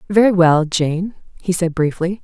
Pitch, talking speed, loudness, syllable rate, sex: 175 Hz, 160 wpm, -16 LUFS, 4.5 syllables/s, female